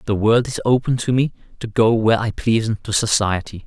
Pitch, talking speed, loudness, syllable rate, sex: 110 Hz, 215 wpm, -18 LUFS, 5.9 syllables/s, male